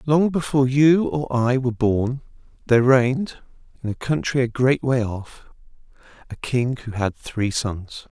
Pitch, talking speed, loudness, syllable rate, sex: 125 Hz, 160 wpm, -21 LUFS, 4.4 syllables/s, male